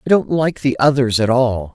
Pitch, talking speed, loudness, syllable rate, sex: 130 Hz, 240 wpm, -16 LUFS, 5.1 syllables/s, male